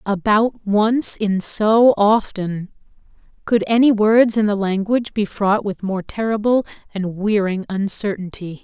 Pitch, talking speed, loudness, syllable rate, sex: 205 Hz, 130 wpm, -18 LUFS, 4.0 syllables/s, female